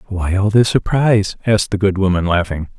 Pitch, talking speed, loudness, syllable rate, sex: 100 Hz, 195 wpm, -16 LUFS, 5.8 syllables/s, male